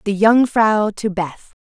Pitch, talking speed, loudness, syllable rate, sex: 210 Hz, 145 wpm, -16 LUFS, 3.6 syllables/s, female